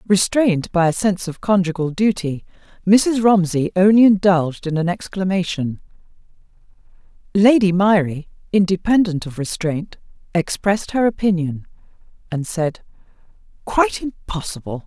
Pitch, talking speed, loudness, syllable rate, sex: 185 Hz, 105 wpm, -18 LUFS, 4.9 syllables/s, female